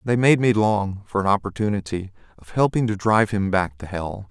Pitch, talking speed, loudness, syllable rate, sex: 105 Hz, 210 wpm, -21 LUFS, 5.4 syllables/s, male